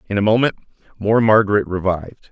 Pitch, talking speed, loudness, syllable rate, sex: 105 Hz, 155 wpm, -17 LUFS, 6.7 syllables/s, male